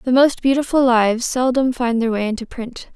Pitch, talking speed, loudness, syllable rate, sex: 245 Hz, 205 wpm, -17 LUFS, 5.3 syllables/s, female